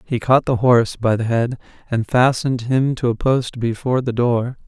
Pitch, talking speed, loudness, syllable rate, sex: 120 Hz, 205 wpm, -18 LUFS, 5.0 syllables/s, male